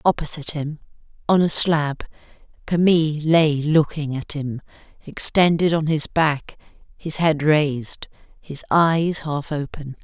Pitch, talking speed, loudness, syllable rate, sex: 155 Hz, 125 wpm, -20 LUFS, 4.1 syllables/s, female